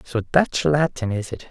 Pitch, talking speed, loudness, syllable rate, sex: 130 Hz, 200 wpm, -21 LUFS, 4.7 syllables/s, male